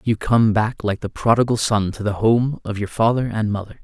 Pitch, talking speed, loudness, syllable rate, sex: 110 Hz, 235 wpm, -19 LUFS, 5.1 syllables/s, male